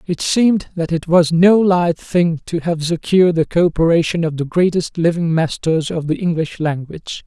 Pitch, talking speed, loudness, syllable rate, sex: 170 Hz, 180 wpm, -16 LUFS, 4.8 syllables/s, male